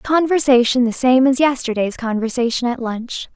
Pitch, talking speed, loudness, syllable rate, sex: 250 Hz, 145 wpm, -17 LUFS, 4.9 syllables/s, female